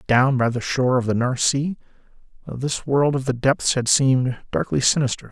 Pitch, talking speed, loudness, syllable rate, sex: 130 Hz, 190 wpm, -20 LUFS, 5.2 syllables/s, male